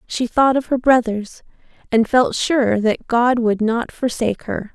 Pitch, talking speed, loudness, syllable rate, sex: 235 Hz, 175 wpm, -18 LUFS, 4.1 syllables/s, female